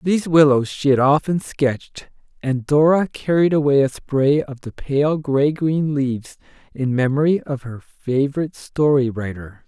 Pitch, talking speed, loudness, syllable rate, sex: 140 Hz, 155 wpm, -19 LUFS, 4.6 syllables/s, male